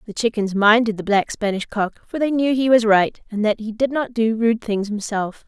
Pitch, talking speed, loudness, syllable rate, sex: 220 Hz, 240 wpm, -19 LUFS, 5.1 syllables/s, female